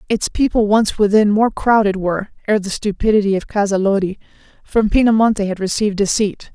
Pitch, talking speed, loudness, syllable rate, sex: 205 Hz, 155 wpm, -16 LUFS, 5.8 syllables/s, female